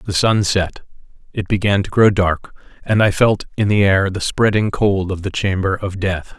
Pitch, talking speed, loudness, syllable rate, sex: 100 Hz, 205 wpm, -17 LUFS, 4.6 syllables/s, male